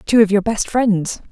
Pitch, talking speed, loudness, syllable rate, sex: 210 Hz, 230 wpm, -16 LUFS, 4.4 syllables/s, female